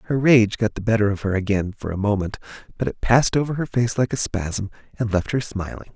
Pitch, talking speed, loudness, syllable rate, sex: 110 Hz, 240 wpm, -22 LUFS, 5.9 syllables/s, male